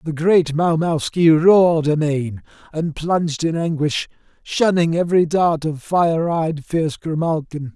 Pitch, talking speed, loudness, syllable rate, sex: 160 Hz, 130 wpm, -18 LUFS, 4.2 syllables/s, male